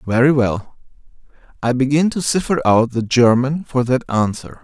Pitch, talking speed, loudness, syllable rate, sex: 130 Hz, 155 wpm, -17 LUFS, 4.6 syllables/s, male